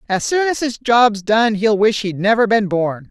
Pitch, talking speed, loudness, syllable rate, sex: 215 Hz, 230 wpm, -16 LUFS, 4.4 syllables/s, female